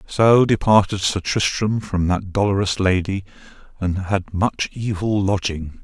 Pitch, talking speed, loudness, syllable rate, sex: 100 Hz, 135 wpm, -20 LUFS, 4.1 syllables/s, male